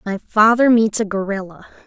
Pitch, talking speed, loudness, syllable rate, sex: 210 Hz, 160 wpm, -16 LUFS, 5.1 syllables/s, female